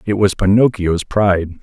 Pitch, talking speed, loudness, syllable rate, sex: 100 Hz, 150 wpm, -15 LUFS, 4.7 syllables/s, male